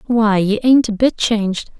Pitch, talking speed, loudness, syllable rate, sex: 220 Hz, 200 wpm, -15 LUFS, 4.6 syllables/s, female